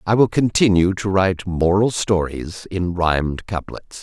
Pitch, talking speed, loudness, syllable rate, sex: 95 Hz, 150 wpm, -19 LUFS, 4.4 syllables/s, male